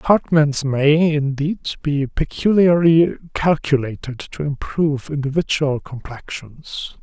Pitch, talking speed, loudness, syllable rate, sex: 145 Hz, 85 wpm, -19 LUFS, 4.0 syllables/s, male